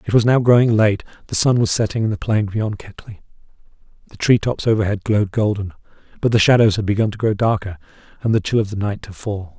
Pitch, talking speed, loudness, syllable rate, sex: 105 Hz, 225 wpm, -18 LUFS, 6.2 syllables/s, male